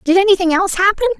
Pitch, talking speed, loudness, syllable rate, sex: 380 Hz, 200 wpm, -14 LUFS, 8.8 syllables/s, female